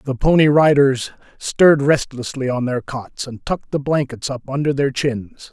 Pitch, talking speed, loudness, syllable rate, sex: 135 Hz, 175 wpm, -18 LUFS, 4.7 syllables/s, male